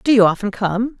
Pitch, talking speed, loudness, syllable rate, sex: 215 Hz, 240 wpm, -17 LUFS, 5.3 syllables/s, female